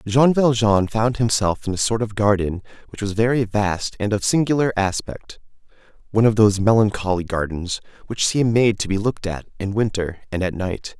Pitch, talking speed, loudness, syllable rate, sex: 105 Hz, 185 wpm, -20 LUFS, 5.3 syllables/s, male